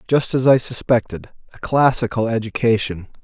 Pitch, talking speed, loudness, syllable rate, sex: 115 Hz, 110 wpm, -18 LUFS, 5.1 syllables/s, male